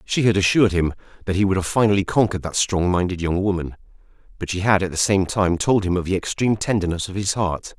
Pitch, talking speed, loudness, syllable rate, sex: 95 Hz, 240 wpm, -20 LUFS, 6.4 syllables/s, male